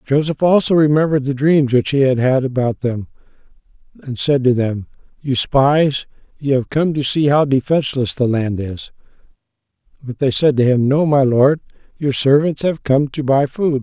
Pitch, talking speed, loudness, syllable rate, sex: 140 Hz, 180 wpm, -16 LUFS, 4.9 syllables/s, male